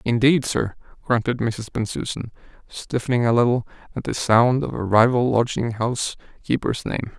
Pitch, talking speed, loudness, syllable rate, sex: 120 Hz, 150 wpm, -21 LUFS, 5.0 syllables/s, male